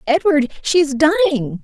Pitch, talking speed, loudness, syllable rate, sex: 270 Hz, 145 wpm, -16 LUFS, 6.7 syllables/s, female